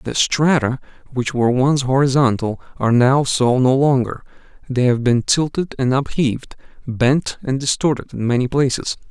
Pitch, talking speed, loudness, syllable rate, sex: 130 Hz, 145 wpm, -18 LUFS, 4.9 syllables/s, male